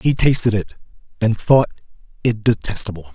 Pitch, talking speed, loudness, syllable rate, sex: 110 Hz, 135 wpm, -18 LUFS, 5.3 syllables/s, male